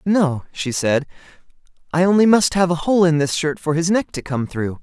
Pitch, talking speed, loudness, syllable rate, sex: 165 Hz, 225 wpm, -18 LUFS, 5.0 syllables/s, male